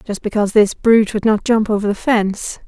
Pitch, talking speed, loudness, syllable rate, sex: 210 Hz, 225 wpm, -16 LUFS, 5.9 syllables/s, female